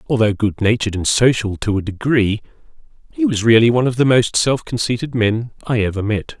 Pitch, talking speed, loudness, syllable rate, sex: 115 Hz, 190 wpm, -17 LUFS, 5.7 syllables/s, male